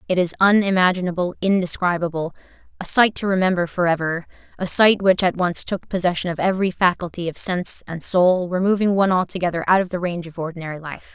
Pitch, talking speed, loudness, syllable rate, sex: 180 Hz, 180 wpm, -20 LUFS, 6.3 syllables/s, female